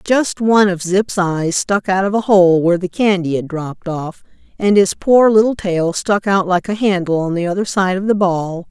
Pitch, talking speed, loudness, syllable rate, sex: 190 Hz, 230 wpm, -15 LUFS, 4.8 syllables/s, female